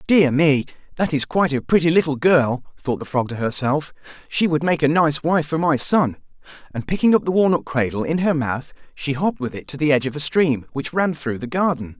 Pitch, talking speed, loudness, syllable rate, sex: 150 Hz, 235 wpm, -20 LUFS, 5.6 syllables/s, male